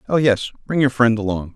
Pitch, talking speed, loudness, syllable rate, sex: 120 Hz, 230 wpm, -19 LUFS, 5.7 syllables/s, male